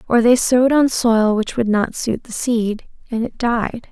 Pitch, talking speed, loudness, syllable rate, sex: 230 Hz, 215 wpm, -17 LUFS, 4.3 syllables/s, female